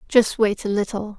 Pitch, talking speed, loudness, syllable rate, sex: 210 Hz, 200 wpm, -21 LUFS, 4.9 syllables/s, female